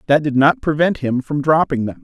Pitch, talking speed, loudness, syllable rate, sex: 150 Hz, 235 wpm, -17 LUFS, 5.4 syllables/s, male